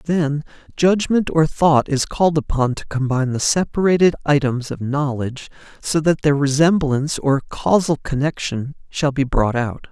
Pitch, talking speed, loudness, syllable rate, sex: 145 Hz, 150 wpm, -19 LUFS, 4.8 syllables/s, male